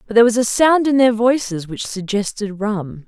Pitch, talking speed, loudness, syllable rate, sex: 220 Hz, 215 wpm, -17 LUFS, 5.2 syllables/s, female